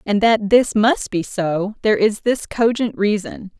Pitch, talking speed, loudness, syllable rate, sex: 210 Hz, 185 wpm, -18 LUFS, 4.2 syllables/s, female